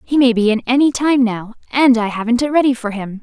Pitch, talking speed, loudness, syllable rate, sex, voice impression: 240 Hz, 260 wpm, -15 LUFS, 5.8 syllables/s, female, very feminine, young, thin, tensed, slightly powerful, very bright, slightly hard, very clear, fluent, very cute, slightly intellectual, very refreshing, sincere, slightly calm, friendly, reassuring, slightly unique, wild, slightly sweet, very lively, kind, slightly intense, slightly sharp